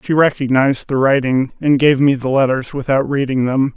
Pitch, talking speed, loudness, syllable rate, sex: 135 Hz, 190 wpm, -15 LUFS, 5.3 syllables/s, male